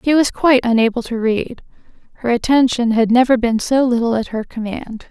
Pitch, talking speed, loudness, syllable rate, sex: 240 Hz, 190 wpm, -16 LUFS, 5.4 syllables/s, female